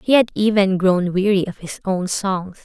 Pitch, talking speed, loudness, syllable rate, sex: 195 Hz, 205 wpm, -19 LUFS, 4.5 syllables/s, female